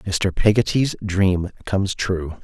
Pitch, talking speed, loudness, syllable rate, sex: 100 Hz, 125 wpm, -21 LUFS, 3.6 syllables/s, male